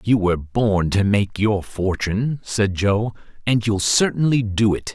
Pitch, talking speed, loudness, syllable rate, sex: 105 Hz, 170 wpm, -20 LUFS, 4.2 syllables/s, male